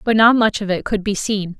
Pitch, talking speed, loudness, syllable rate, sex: 205 Hz, 300 wpm, -17 LUFS, 5.4 syllables/s, female